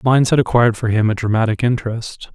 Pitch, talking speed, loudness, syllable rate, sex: 115 Hz, 205 wpm, -17 LUFS, 6.8 syllables/s, male